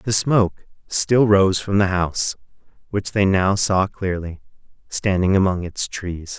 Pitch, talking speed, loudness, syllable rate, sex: 95 Hz, 150 wpm, -20 LUFS, 4.1 syllables/s, male